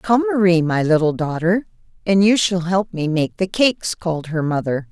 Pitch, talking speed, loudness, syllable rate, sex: 175 Hz, 195 wpm, -18 LUFS, 5.1 syllables/s, female